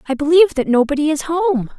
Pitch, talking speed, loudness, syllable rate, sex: 300 Hz, 200 wpm, -15 LUFS, 6.5 syllables/s, female